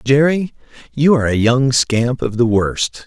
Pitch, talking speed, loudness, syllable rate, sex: 125 Hz, 175 wpm, -15 LUFS, 4.3 syllables/s, male